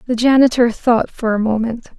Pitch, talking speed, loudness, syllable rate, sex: 235 Hz, 180 wpm, -15 LUFS, 5.0 syllables/s, female